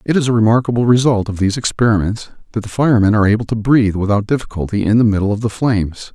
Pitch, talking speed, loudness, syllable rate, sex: 110 Hz, 225 wpm, -15 LUFS, 7.3 syllables/s, male